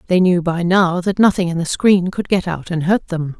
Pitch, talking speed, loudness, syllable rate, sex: 180 Hz, 265 wpm, -16 LUFS, 5.0 syllables/s, female